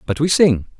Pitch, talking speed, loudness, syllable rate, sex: 145 Hz, 225 wpm, -15 LUFS, 5.4 syllables/s, male